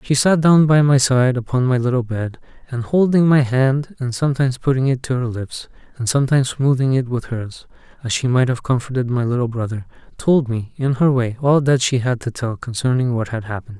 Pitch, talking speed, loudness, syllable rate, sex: 130 Hz, 215 wpm, -18 LUFS, 5.6 syllables/s, male